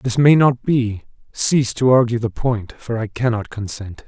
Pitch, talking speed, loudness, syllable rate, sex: 120 Hz, 190 wpm, -18 LUFS, 4.6 syllables/s, male